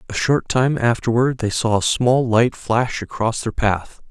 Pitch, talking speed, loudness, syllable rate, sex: 120 Hz, 190 wpm, -19 LUFS, 4.1 syllables/s, male